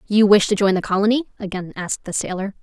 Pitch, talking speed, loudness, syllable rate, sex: 200 Hz, 230 wpm, -19 LUFS, 6.5 syllables/s, female